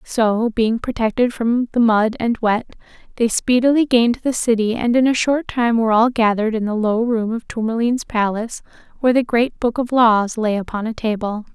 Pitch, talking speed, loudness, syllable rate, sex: 230 Hz, 200 wpm, -18 LUFS, 5.3 syllables/s, female